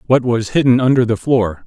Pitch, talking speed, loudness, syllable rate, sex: 120 Hz, 215 wpm, -15 LUFS, 5.3 syllables/s, male